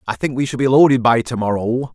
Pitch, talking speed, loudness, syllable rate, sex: 125 Hz, 280 wpm, -16 LUFS, 6.1 syllables/s, male